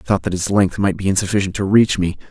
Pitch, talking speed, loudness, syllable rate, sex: 100 Hz, 285 wpm, -17 LUFS, 6.5 syllables/s, male